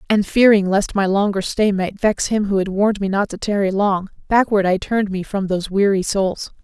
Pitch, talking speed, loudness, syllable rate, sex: 200 Hz, 225 wpm, -18 LUFS, 5.3 syllables/s, female